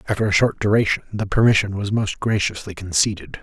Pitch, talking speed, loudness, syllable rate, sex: 100 Hz, 175 wpm, -20 LUFS, 6.0 syllables/s, male